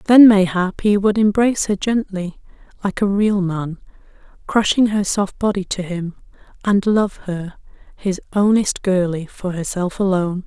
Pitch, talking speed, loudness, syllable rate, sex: 195 Hz, 150 wpm, -18 LUFS, 4.4 syllables/s, female